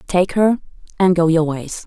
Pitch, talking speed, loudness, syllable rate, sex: 175 Hz, 195 wpm, -17 LUFS, 4.5 syllables/s, female